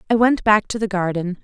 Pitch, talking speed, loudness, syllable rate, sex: 205 Hz, 250 wpm, -18 LUFS, 5.7 syllables/s, female